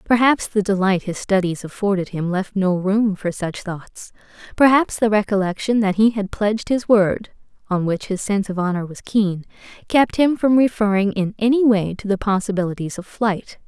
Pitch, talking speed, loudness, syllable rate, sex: 205 Hz, 185 wpm, -19 LUFS, 4.4 syllables/s, female